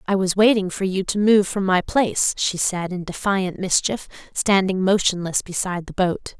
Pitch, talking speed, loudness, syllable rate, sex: 190 Hz, 190 wpm, -20 LUFS, 4.9 syllables/s, female